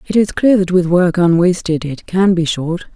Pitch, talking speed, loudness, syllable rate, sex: 175 Hz, 225 wpm, -14 LUFS, 4.7 syllables/s, female